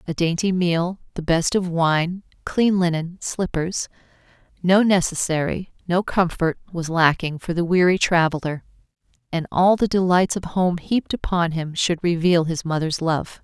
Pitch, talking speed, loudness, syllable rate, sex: 175 Hz, 145 wpm, -21 LUFS, 4.5 syllables/s, female